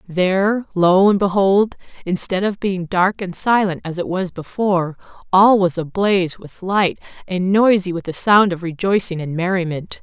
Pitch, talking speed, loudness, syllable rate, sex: 185 Hz, 170 wpm, -18 LUFS, 4.6 syllables/s, female